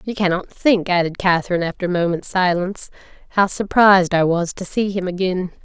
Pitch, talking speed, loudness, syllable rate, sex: 185 Hz, 180 wpm, -18 LUFS, 5.9 syllables/s, female